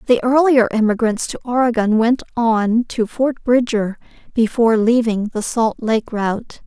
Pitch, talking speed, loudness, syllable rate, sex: 230 Hz, 145 wpm, -17 LUFS, 4.5 syllables/s, female